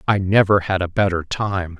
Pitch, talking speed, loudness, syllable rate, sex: 95 Hz, 200 wpm, -19 LUFS, 4.9 syllables/s, male